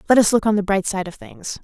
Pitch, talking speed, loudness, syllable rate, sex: 205 Hz, 330 wpm, -18 LUFS, 6.3 syllables/s, female